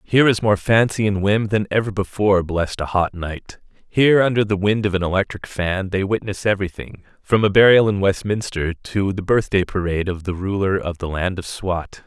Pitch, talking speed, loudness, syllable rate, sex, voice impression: 100 Hz, 205 wpm, -19 LUFS, 5.4 syllables/s, male, masculine, very adult-like, fluent, intellectual, elegant, sweet